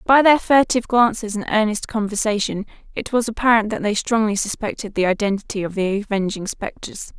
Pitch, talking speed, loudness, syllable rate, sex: 215 Hz, 165 wpm, -19 LUFS, 5.7 syllables/s, female